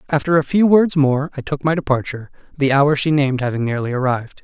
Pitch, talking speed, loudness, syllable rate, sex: 140 Hz, 215 wpm, -17 LUFS, 6.4 syllables/s, male